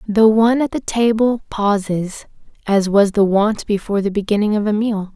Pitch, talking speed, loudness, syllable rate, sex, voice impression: 210 Hz, 185 wpm, -17 LUFS, 5.0 syllables/s, female, feminine, adult-like, soft, slightly muffled, slightly raspy, refreshing, friendly, slightly sweet